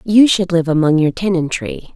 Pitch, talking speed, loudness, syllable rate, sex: 175 Hz, 185 wpm, -15 LUFS, 4.9 syllables/s, female